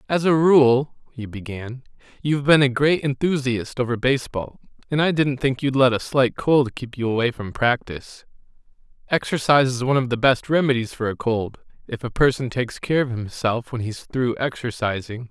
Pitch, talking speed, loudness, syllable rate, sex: 125 Hz, 185 wpm, -21 LUFS, 5.3 syllables/s, male